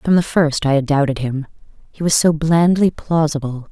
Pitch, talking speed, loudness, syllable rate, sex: 150 Hz, 195 wpm, -17 LUFS, 4.9 syllables/s, female